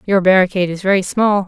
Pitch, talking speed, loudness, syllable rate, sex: 190 Hz, 205 wpm, -15 LUFS, 6.8 syllables/s, female